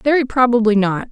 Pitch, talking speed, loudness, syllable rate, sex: 235 Hz, 160 wpm, -15 LUFS, 5.7 syllables/s, female